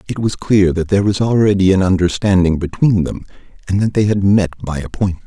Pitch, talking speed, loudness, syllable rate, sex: 95 Hz, 205 wpm, -15 LUFS, 6.1 syllables/s, male